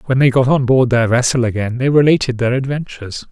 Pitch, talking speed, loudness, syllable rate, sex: 125 Hz, 215 wpm, -15 LUFS, 6.0 syllables/s, male